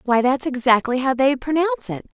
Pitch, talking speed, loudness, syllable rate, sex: 255 Hz, 190 wpm, -19 LUFS, 5.6 syllables/s, female